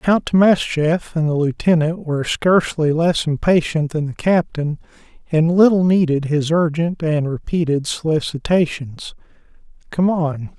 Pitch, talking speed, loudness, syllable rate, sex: 160 Hz, 125 wpm, -18 LUFS, 4.5 syllables/s, male